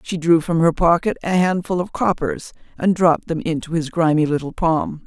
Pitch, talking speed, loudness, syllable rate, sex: 165 Hz, 200 wpm, -19 LUFS, 5.1 syllables/s, female